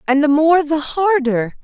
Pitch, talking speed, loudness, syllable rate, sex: 295 Hz, 185 wpm, -15 LUFS, 4.1 syllables/s, female